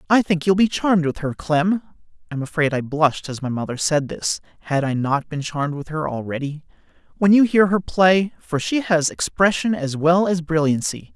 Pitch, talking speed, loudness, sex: 165 Hz, 195 wpm, -20 LUFS, male